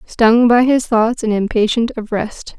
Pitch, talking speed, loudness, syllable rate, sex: 225 Hz, 185 wpm, -15 LUFS, 4.2 syllables/s, female